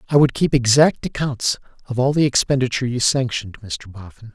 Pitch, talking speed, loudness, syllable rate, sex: 125 Hz, 180 wpm, -19 LUFS, 5.7 syllables/s, male